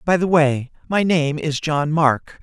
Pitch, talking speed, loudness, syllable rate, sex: 155 Hz, 200 wpm, -19 LUFS, 3.7 syllables/s, male